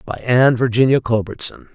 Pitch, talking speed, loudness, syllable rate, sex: 120 Hz, 140 wpm, -16 LUFS, 5.7 syllables/s, male